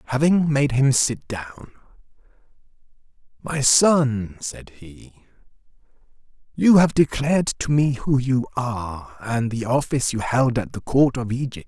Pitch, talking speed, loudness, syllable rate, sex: 130 Hz, 140 wpm, -20 LUFS, 4.1 syllables/s, male